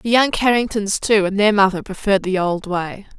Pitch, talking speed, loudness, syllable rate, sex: 200 Hz, 205 wpm, -18 LUFS, 5.3 syllables/s, female